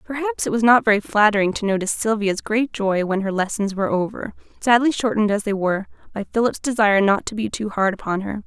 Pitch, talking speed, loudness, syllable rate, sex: 210 Hz, 220 wpm, -20 LUFS, 6.3 syllables/s, female